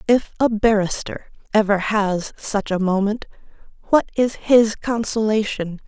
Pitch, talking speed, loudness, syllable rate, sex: 210 Hz, 125 wpm, -20 LUFS, 4.1 syllables/s, female